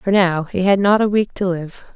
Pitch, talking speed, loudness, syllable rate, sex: 190 Hz, 275 wpm, -17 LUFS, 4.9 syllables/s, female